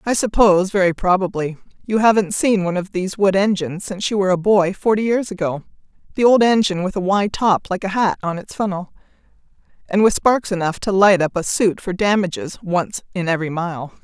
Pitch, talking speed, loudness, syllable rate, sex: 190 Hz, 200 wpm, -18 LUFS, 5.9 syllables/s, female